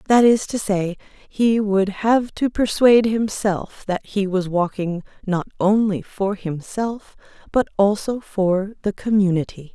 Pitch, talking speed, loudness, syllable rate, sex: 205 Hz, 140 wpm, -20 LUFS, 3.9 syllables/s, female